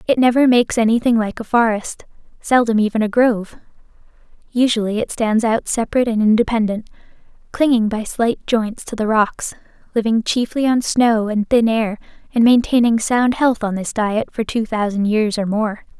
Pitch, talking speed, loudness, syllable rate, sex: 225 Hz, 170 wpm, -17 LUFS, 5.1 syllables/s, female